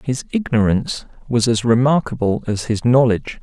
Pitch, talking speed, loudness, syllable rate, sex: 120 Hz, 140 wpm, -18 LUFS, 5.3 syllables/s, male